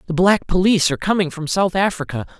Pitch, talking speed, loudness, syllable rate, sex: 175 Hz, 200 wpm, -18 LUFS, 6.6 syllables/s, male